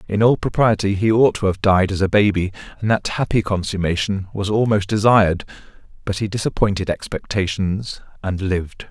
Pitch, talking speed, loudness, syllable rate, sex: 100 Hz, 160 wpm, -19 LUFS, 5.4 syllables/s, male